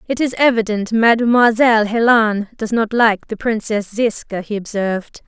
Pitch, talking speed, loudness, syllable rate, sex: 220 Hz, 150 wpm, -16 LUFS, 4.8 syllables/s, female